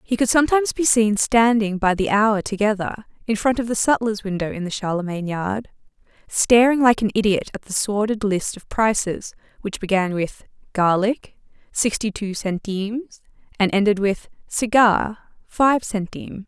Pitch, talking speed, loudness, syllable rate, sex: 210 Hz, 155 wpm, -20 LUFS, 4.7 syllables/s, female